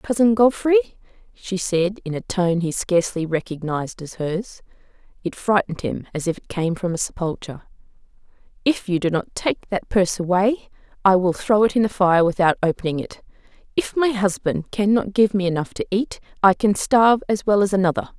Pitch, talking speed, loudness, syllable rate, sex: 190 Hz, 180 wpm, -20 LUFS, 5.3 syllables/s, female